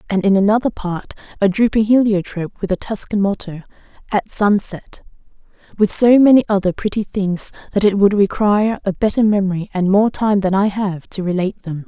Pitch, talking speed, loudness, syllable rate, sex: 200 Hz, 170 wpm, -17 LUFS, 5.5 syllables/s, female